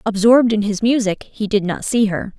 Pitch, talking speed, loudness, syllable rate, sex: 215 Hz, 225 wpm, -17 LUFS, 5.3 syllables/s, female